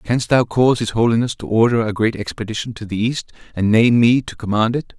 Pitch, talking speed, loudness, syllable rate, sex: 115 Hz, 230 wpm, -17 LUFS, 5.8 syllables/s, male